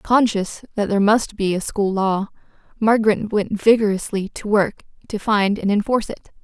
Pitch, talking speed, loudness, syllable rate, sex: 205 Hz, 170 wpm, -19 LUFS, 5.1 syllables/s, female